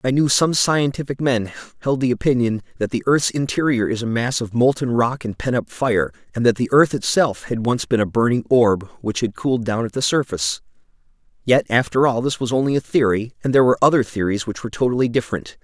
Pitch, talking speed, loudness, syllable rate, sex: 120 Hz, 220 wpm, -19 LUFS, 6.0 syllables/s, male